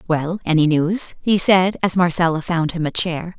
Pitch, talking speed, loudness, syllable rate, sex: 170 Hz, 175 wpm, -18 LUFS, 4.5 syllables/s, female